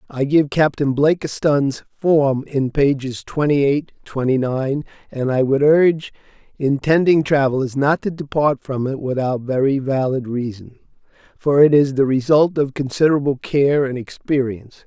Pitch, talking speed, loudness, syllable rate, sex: 140 Hz, 145 wpm, -18 LUFS, 4.6 syllables/s, male